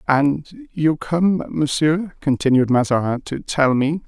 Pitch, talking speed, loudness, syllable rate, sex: 150 Hz, 130 wpm, -19 LUFS, 3.7 syllables/s, male